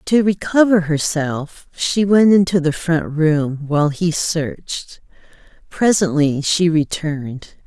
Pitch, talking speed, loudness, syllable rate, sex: 165 Hz, 115 wpm, -17 LUFS, 3.7 syllables/s, female